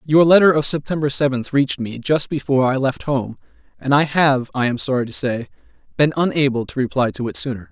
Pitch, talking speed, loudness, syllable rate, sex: 135 Hz, 210 wpm, -18 LUFS, 5.9 syllables/s, male